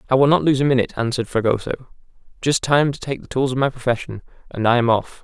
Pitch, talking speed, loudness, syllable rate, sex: 125 Hz, 230 wpm, -19 LUFS, 7.1 syllables/s, male